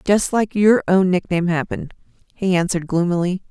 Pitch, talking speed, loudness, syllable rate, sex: 185 Hz, 155 wpm, -18 LUFS, 5.8 syllables/s, female